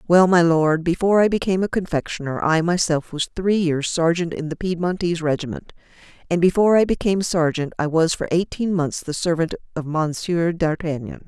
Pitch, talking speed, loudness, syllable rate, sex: 170 Hz, 175 wpm, -20 LUFS, 5.6 syllables/s, female